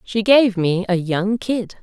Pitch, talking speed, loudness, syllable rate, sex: 205 Hz, 195 wpm, -18 LUFS, 3.6 syllables/s, female